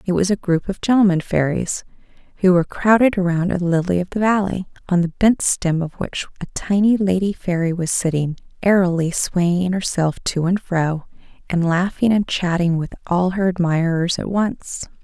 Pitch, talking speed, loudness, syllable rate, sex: 180 Hz, 175 wpm, -19 LUFS, 4.8 syllables/s, female